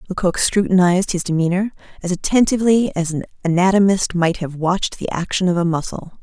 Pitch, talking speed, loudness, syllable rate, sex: 180 Hz, 165 wpm, -18 LUFS, 5.9 syllables/s, female